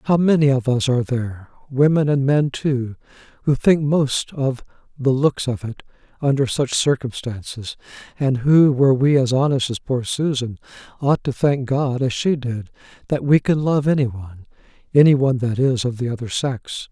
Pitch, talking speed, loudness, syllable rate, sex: 135 Hz, 175 wpm, -19 LUFS, 4.7 syllables/s, male